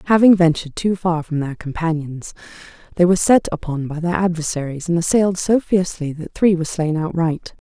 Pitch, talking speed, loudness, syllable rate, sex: 170 Hz, 180 wpm, -18 LUFS, 5.8 syllables/s, female